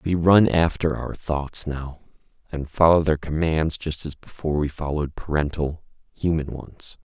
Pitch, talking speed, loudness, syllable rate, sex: 75 Hz, 150 wpm, -23 LUFS, 4.6 syllables/s, male